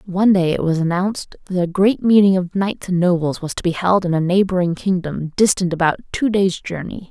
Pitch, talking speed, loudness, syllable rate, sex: 185 Hz, 220 wpm, -18 LUFS, 5.6 syllables/s, female